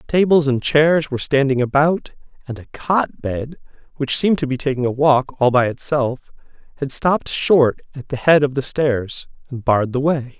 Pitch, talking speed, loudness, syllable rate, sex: 140 Hz, 190 wpm, -18 LUFS, 4.8 syllables/s, male